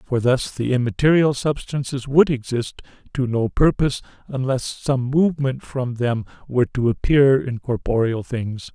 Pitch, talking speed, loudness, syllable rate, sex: 130 Hz, 145 wpm, -20 LUFS, 4.6 syllables/s, male